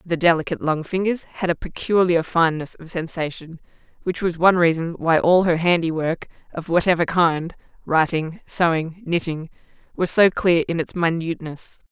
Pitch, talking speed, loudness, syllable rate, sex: 170 Hz, 140 wpm, -21 LUFS, 5.1 syllables/s, female